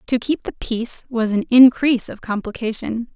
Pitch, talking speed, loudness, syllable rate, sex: 235 Hz, 170 wpm, -18 LUFS, 5.2 syllables/s, female